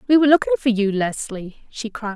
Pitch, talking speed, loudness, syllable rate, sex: 220 Hz, 225 wpm, -19 LUFS, 5.9 syllables/s, female